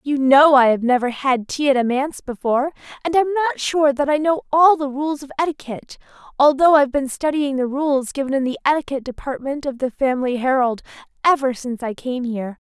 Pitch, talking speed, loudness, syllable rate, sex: 275 Hz, 200 wpm, -19 LUFS, 6.0 syllables/s, female